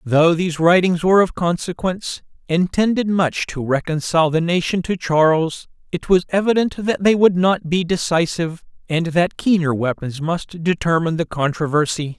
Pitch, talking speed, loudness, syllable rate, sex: 170 Hz, 160 wpm, -18 LUFS, 5.1 syllables/s, male